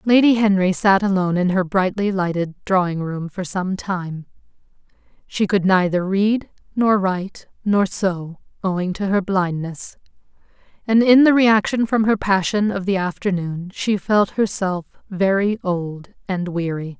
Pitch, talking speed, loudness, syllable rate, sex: 190 Hz, 150 wpm, -19 LUFS, 4.3 syllables/s, female